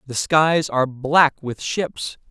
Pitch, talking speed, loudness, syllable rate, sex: 145 Hz, 155 wpm, -19 LUFS, 3.5 syllables/s, male